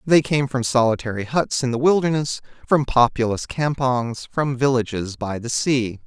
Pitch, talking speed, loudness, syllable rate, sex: 130 Hz, 160 wpm, -21 LUFS, 4.6 syllables/s, male